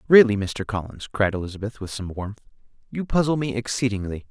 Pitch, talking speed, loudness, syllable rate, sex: 110 Hz, 165 wpm, -24 LUFS, 6.0 syllables/s, male